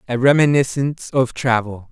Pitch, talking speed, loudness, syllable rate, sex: 130 Hz, 125 wpm, -17 LUFS, 5.2 syllables/s, male